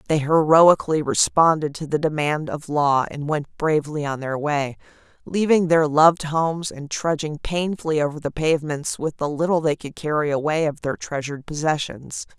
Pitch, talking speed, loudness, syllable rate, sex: 150 Hz, 170 wpm, -21 LUFS, 5.1 syllables/s, female